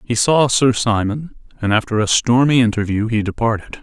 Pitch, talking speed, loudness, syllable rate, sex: 115 Hz, 170 wpm, -16 LUFS, 5.1 syllables/s, male